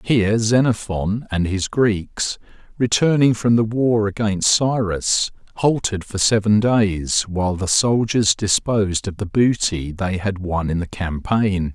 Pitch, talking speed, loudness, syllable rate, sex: 105 Hz, 145 wpm, -19 LUFS, 3.9 syllables/s, male